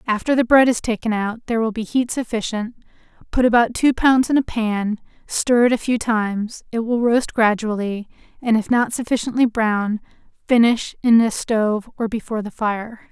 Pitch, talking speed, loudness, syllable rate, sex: 230 Hz, 180 wpm, -19 LUFS, 5.0 syllables/s, female